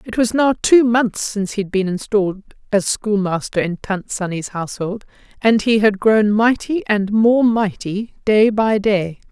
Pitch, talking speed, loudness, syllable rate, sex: 210 Hz, 175 wpm, -17 LUFS, 4.4 syllables/s, female